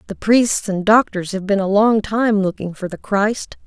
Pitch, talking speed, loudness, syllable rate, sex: 205 Hz, 215 wpm, -17 LUFS, 4.4 syllables/s, female